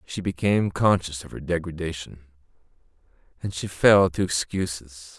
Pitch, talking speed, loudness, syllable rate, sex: 85 Hz, 125 wpm, -24 LUFS, 4.9 syllables/s, male